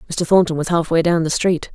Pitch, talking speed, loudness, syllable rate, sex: 165 Hz, 275 wpm, -17 LUFS, 5.8 syllables/s, female